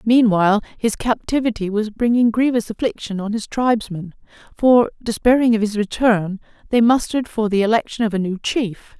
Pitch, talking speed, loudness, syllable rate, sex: 220 Hz, 160 wpm, -18 LUFS, 5.3 syllables/s, female